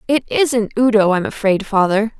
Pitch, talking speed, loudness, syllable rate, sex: 220 Hz, 165 wpm, -16 LUFS, 4.8 syllables/s, female